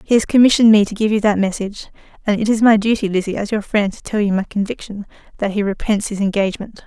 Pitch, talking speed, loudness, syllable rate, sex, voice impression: 205 Hz, 235 wpm, -17 LUFS, 6.9 syllables/s, female, feminine, adult-like, tensed, powerful, slightly hard, clear, fluent, intellectual, calm, elegant, lively, strict, slightly sharp